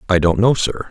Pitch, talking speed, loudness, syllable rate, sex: 100 Hz, 265 wpm, -16 LUFS, 5.5 syllables/s, male